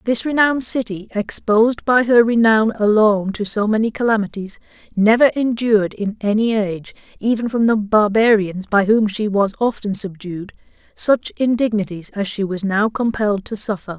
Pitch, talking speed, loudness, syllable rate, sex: 215 Hz, 155 wpm, -17 LUFS, 5.1 syllables/s, female